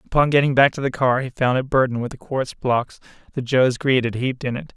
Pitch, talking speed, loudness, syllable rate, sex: 130 Hz, 265 wpm, -20 LUFS, 6.1 syllables/s, male